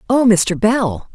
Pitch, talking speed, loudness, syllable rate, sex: 205 Hz, 155 wpm, -15 LUFS, 3.3 syllables/s, female